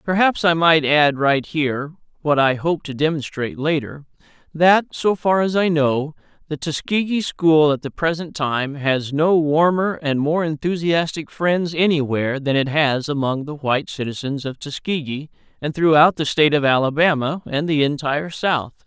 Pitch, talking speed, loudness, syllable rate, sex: 155 Hz, 165 wpm, -19 LUFS, 4.7 syllables/s, male